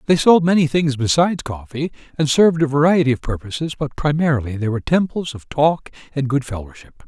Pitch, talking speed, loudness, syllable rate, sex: 145 Hz, 185 wpm, -18 LUFS, 6.0 syllables/s, male